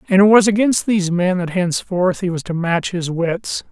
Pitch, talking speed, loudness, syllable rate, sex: 185 Hz, 225 wpm, -17 LUFS, 5.1 syllables/s, male